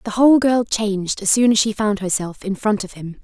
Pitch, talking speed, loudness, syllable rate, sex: 210 Hz, 260 wpm, -18 LUFS, 5.5 syllables/s, female